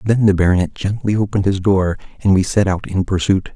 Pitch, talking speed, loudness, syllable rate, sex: 95 Hz, 220 wpm, -17 LUFS, 5.9 syllables/s, male